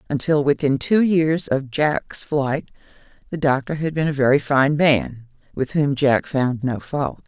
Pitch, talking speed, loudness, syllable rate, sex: 140 Hz, 175 wpm, -20 LUFS, 4.1 syllables/s, female